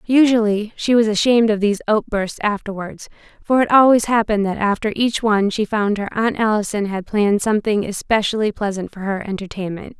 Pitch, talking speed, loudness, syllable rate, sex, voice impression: 210 Hz, 175 wpm, -18 LUFS, 5.7 syllables/s, female, very feminine, slightly young, slightly adult-like, very thin, tensed, slightly weak, bright, slightly soft, clear, fluent, cute, slightly intellectual, refreshing, sincere, slightly calm, slightly reassuring, unique, slightly elegant, sweet, kind, slightly modest